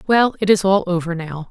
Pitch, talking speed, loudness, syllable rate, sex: 185 Hz, 240 wpm, -18 LUFS, 5.3 syllables/s, female